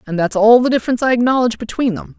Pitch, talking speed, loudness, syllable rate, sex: 235 Hz, 245 wpm, -15 LUFS, 7.8 syllables/s, female